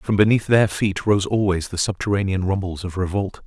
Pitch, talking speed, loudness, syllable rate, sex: 100 Hz, 190 wpm, -20 LUFS, 5.3 syllables/s, male